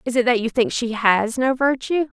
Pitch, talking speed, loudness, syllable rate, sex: 245 Hz, 245 wpm, -20 LUFS, 5.0 syllables/s, female